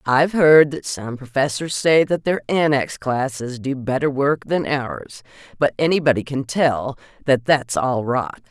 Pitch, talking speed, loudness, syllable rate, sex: 135 Hz, 155 wpm, -19 LUFS, 4.3 syllables/s, female